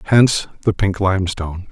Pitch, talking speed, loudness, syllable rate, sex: 95 Hz, 140 wpm, -18 LUFS, 5.7 syllables/s, male